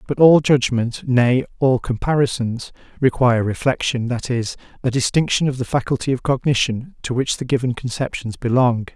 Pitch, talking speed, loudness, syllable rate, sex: 125 Hz, 155 wpm, -19 LUFS, 5.3 syllables/s, male